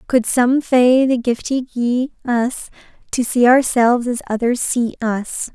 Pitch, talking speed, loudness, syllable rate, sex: 245 Hz, 175 wpm, -17 LUFS, 4.4 syllables/s, female